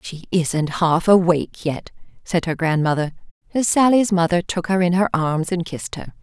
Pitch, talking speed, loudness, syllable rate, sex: 175 Hz, 185 wpm, -19 LUFS, 4.9 syllables/s, female